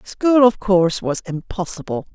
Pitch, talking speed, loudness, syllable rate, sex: 195 Hz, 140 wpm, -18 LUFS, 4.7 syllables/s, female